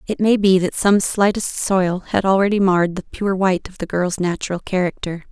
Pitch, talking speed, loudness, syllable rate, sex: 190 Hz, 205 wpm, -18 LUFS, 5.3 syllables/s, female